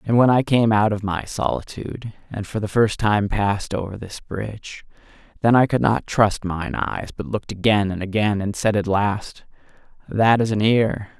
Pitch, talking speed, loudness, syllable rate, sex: 105 Hz, 200 wpm, -21 LUFS, 4.8 syllables/s, male